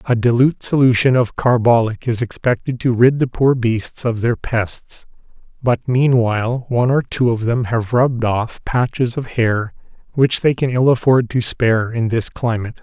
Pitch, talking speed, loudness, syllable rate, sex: 120 Hz, 180 wpm, -17 LUFS, 4.7 syllables/s, male